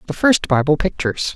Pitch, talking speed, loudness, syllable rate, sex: 165 Hz, 175 wpm, -17 LUFS, 6.0 syllables/s, male